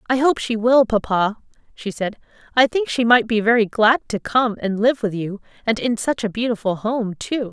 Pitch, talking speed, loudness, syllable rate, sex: 225 Hz, 215 wpm, -19 LUFS, 4.9 syllables/s, female